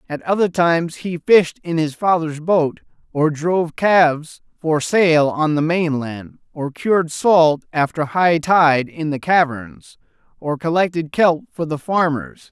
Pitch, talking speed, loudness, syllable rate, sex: 160 Hz, 155 wpm, -18 LUFS, 4.0 syllables/s, male